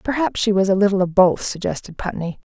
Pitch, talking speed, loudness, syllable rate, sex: 200 Hz, 215 wpm, -19 LUFS, 6.0 syllables/s, female